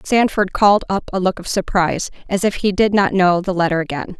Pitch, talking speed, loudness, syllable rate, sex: 190 Hz, 230 wpm, -17 LUFS, 5.7 syllables/s, female